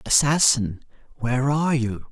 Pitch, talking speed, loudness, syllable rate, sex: 130 Hz, 115 wpm, -21 LUFS, 5.1 syllables/s, male